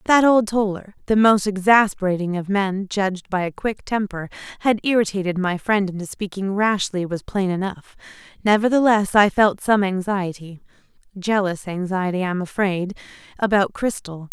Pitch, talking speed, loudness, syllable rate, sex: 195 Hz, 140 wpm, -20 LUFS, 4.5 syllables/s, female